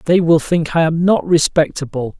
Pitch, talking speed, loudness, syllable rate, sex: 160 Hz, 190 wpm, -15 LUFS, 4.9 syllables/s, male